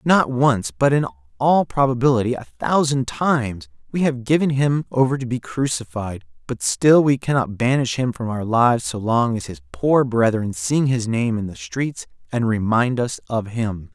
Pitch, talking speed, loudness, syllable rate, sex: 125 Hz, 185 wpm, -20 LUFS, 4.7 syllables/s, male